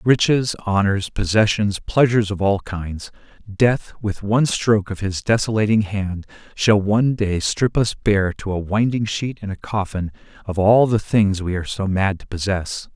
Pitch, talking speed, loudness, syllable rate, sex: 100 Hz, 175 wpm, -20 LUFS, 4.6 syllables/s, male